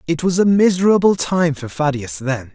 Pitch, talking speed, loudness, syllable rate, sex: 160 Hz, 190 wpm, -17 LUFS, 5.0 syllables/s, male